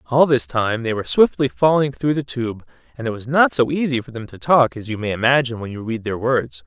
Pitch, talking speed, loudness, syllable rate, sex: 125 Hz, 260 wpm, -19 LUFS, 5.8 syllables/s, male